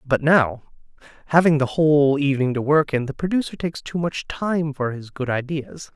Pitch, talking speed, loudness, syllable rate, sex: 145 Hz, 190 wpm, -21 LUFS, 5.2 syllables/s, male